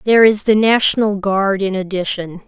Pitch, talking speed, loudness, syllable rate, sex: 200 Hz, 170 wpm, -15 LUFS, 5.2 syllables/s, female